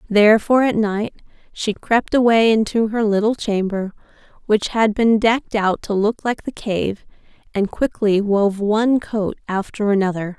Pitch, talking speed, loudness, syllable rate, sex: 215 Hz, 155 wpm, -18 LUFS, 4.6 syllables/s, female